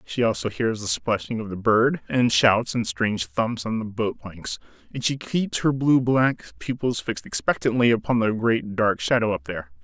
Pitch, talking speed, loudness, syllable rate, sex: 115 Hz, 200 wpm, -23 LUFS, 4.8 syllables/s, male